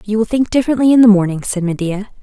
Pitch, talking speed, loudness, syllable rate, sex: 215 Hz, 240 wpm, -14 LUFS, 7.1 syllables/s, female